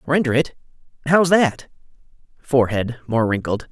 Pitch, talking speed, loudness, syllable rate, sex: 135 Hz, 115 wpm, -19 LUFS, 3.5 syllables/s, male